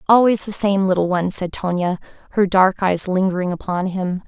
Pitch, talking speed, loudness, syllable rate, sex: 190 Hz, 180 wpm, -18 LUFS, 5.4 syllables/s, female